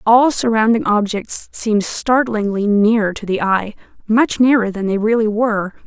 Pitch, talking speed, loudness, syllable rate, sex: 215 Hz, 155 wpm, -16 LUFS, 4.5 syllables/s, female